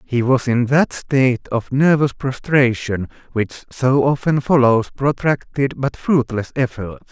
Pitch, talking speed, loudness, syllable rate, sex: 130 Hz, 135 wpm, -18 LUFS, 4.0 syllables/s, male